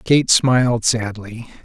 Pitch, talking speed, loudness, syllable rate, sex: 120 Hz, 110 wpm, -16 LUFS, 3.6 syllables/s, male